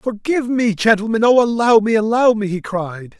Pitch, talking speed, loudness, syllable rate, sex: 220 Hz, 190 wpm, -16 LUFS, 5.1 syllables/s, male